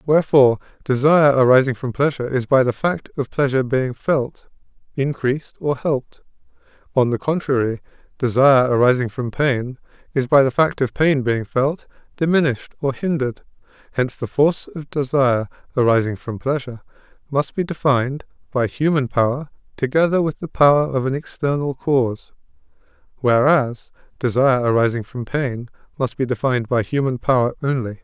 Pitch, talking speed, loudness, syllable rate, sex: 130 Hz, 145 wpm, -19 LUFS, 5.5 syllables/s, male